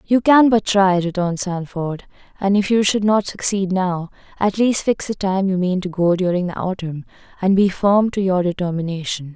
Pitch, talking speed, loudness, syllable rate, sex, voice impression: 190 Hz, 200 wpm, -18 LUFS, 4.9 syllables/s, female, feminine, slightly young, cute, slightly calm, friendly, slightly kind